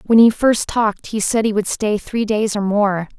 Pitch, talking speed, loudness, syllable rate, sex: 210 Hz, 245 wpm, -17 LUFS, 4.8 syllables/s, female